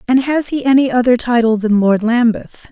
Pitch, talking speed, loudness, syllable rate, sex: 245 Hz, 200 wpm, -14 LUFS, 5.1 syllables/s, female